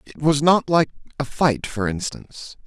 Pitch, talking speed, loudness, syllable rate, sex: 140 Hz, 180 wpm, -21 LUFS, 4.6 syllables/s, male